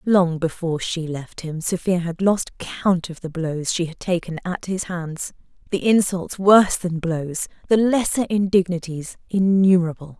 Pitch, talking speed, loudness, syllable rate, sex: 175 Hz, 160 wpm, -21 LUFS, 4.4 syllables/s, female